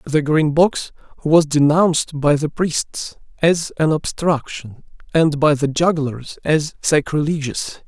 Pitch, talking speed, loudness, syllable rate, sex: 150 Hz, 130 wpm, -18 LUFS, 3.7 syllables/s, male